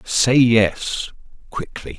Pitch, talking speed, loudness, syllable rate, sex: 110 Hz, 90 wpm, -17 LUFS, 2.6 syllables/s, male